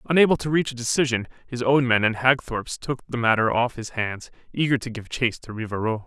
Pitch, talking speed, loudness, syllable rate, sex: 120 Hz, 220 wpm, -23 LUFS, 6.1 syllables/s, male